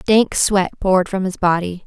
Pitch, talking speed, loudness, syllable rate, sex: 190 Hz, 195 wpm, -17 LUFS, 4.9 syllables/s, female